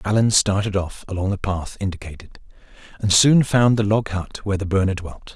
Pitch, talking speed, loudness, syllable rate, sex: 100 Hz, 190 wpm, -20 LUFS, 5.7 syllables/s, male